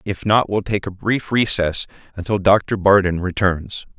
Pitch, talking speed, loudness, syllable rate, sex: 100 Hz, 165 wpm, -18 LUFS, 4.6 syllables/s, male